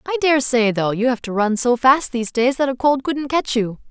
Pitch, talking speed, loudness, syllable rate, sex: 255 Hz, 275 wpm, -18 LUFS, 5.3 syllables/s, female